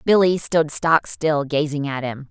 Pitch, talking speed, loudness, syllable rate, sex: 150 Hz, 180 wpm, -20 LUFS, 4.1 syllables/s, female